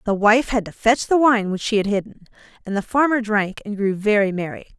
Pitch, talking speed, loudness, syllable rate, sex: 215 Hz, 240 wpm, -19 LUFS, 5.4 syllables/s, female